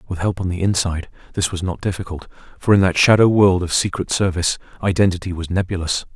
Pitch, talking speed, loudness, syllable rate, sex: 90 Hz, 195 wpm, -18 LUFS, 6.4 syllables/s, male